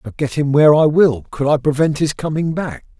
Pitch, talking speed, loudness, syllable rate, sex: 145 Hz, 240 wpm, -16 LUFS, 5.5 syllables/s, male